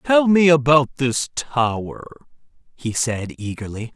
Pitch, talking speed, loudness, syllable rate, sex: 130 Hz, 120 wpm, -19 LUFS, 4.1 syllables/s, male